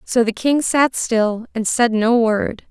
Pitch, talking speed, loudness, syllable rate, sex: 235 Hz, 200 wpm, -17 LUFS, 3.6 syllables/s, female